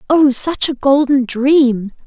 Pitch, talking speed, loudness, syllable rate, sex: 270 Hz, 145 wpm, -14 LUFS, 3.4 syllables/s, female